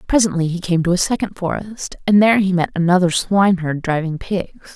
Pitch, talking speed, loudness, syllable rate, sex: 180 Hz, 190 wpm, -17 LUFS, 5.6 syllables/s, female